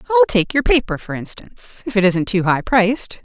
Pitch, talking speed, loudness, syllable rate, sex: 200 Hz, 205 wpm, -17 LUFS, 6.4 syllables/s, female